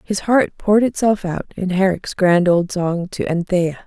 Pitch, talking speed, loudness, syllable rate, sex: 185 Hz, 185 wpm, -18 LUFS, 4.6 syllables/s, female